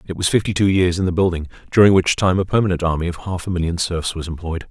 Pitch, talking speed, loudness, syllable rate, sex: 90 Hz, 270 wpm, -18 LUFS, 6.7 syllables/s, male